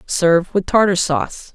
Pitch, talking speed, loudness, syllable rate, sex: 180 Hz, 155 wpm, -16 LUFS, 4.9 syllables/s, female